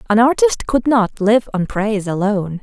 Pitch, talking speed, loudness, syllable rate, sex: 220 Hz, 185 wpm, -16 LUFS, 5.0 syllables/s, female